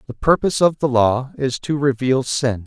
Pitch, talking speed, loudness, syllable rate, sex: 130 Hz, 205 wpm, -18 LUFS, 4.9 syllables/s, male